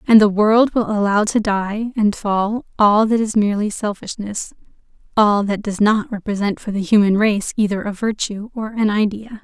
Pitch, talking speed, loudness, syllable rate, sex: 210 Hz, 185 wpm, -18 LUFS, 4.7 syllables/s, female